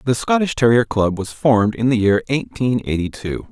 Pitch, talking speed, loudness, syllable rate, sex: 115 Hz, 205 wpm, -18 LUFS, 5.1 syllables/s, male